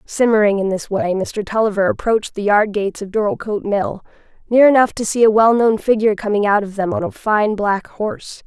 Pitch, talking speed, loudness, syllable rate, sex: 210 Hz, 200 wpm, -17 LUFS, 5.6 syllables/s, female